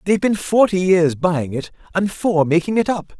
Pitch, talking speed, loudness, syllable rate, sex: 180 Hz, 205 wpm, -18 LUFS, 5.0 syllables/s, male